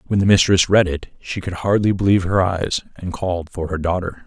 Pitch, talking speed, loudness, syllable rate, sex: 90 Hz, 225 wpm, -19 LUFS, 5.6 syllables/s, male